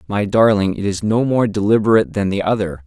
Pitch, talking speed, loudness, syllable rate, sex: 100 Hz, 210 wpm, -16 LUFS, 5.9 syllables/s, male